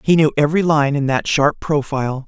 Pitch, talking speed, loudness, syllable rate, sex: 145 Hz, 210 wpm, -17 LUFS, 5.6 syllables/s, male